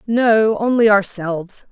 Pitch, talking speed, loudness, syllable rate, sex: 210 Hz, 105 wpm, -16 LUFS, 3.9 syllables/s, female